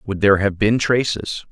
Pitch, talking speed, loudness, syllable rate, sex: 105 Hz, 200 wpm, -18 LUFS, 5.1 syllables/s, male